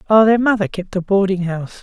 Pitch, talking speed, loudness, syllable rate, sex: 195 Hz, 230 wpm, -16 LUFS, 6.4 syllables/s, female